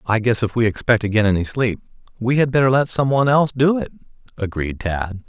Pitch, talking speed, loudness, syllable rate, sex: 120 Hz, 225 wpm, -19 LUFS, 6.1 syllables/s, male